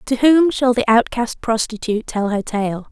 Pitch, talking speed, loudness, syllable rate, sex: 235 Hz, 185 wpm, -17 LUFS, 4.7 syllables/s, female